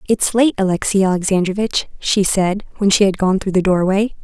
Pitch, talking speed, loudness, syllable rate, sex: 195 Hz, 185 wpm, -16 LUFS, 5.4 syllables/s, female